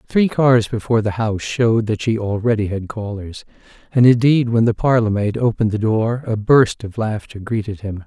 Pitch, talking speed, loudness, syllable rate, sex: 110 Hz, 195 wpm, -18 LUFS, 5.3 syllables/s, male